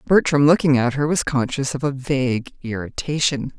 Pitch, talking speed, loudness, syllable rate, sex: 135 Hz, 170 wpm, -20 LUFS, 5.1 syllables/s, female